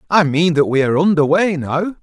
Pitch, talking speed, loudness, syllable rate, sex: 165 Hz, 210 wpm, -15 LUFS, 5.0 syllables/s, male